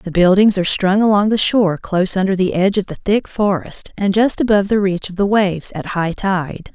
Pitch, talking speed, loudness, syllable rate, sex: 195 Hz, 230 wpm, -16 LUFS, 5.6 syllables/s, female